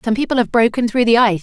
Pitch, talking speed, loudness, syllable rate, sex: 230 Hz, 295 wpm, -15 LUFS, 7.5 syllables/s, female